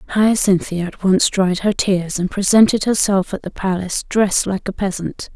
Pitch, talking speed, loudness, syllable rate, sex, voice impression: 195 Hz, 180 wpm, -17 LUFS, 4.7 syllables/s, female, very feminine, very adult-like, very thin, very relaxed, very weak, dark, soft, slightly muffled, very fluent, raspy, cute, very intellectual, refreshing, very sincere, very calm, very friendly, very reassuring, very unique, elegant, wild, very sweet, slightly lively, very kind, slightly sharp, modest, slightly light